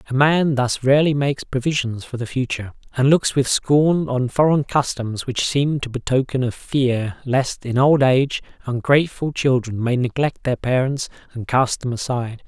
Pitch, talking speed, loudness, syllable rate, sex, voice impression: 130 Hz, 175 wpm, -20 LUFS, 4.9 syllables/s, male, masculine, very adult-like, slightly muffled, slightly calm, slightly elegant, slightly kind